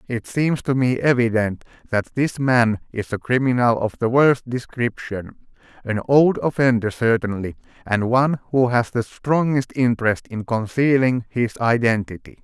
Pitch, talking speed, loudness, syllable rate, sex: 120 Hz, 140 wpm, -20 LUFS, 4.5 syllables/s, male